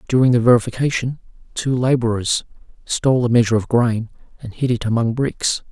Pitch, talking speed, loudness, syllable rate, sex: 120 Hz, 160 wpm, -18 LUFS, 5.9 syllables/s, male